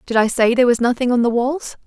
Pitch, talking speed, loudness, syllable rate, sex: 245 Hz, 290 wpm, -17 LUFS, 6.5 syllables/s, female